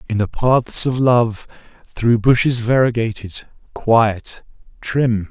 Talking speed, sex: 115 wpm, male